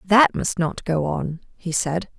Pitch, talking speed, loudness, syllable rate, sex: 175 Hz, 190 wpm, -22 LUFS, 3.7 syllables/s, female